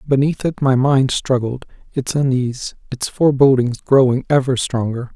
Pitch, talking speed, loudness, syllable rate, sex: 130 Hz, 140 wpm, -17 LUFS, 4.8 syllables/s, male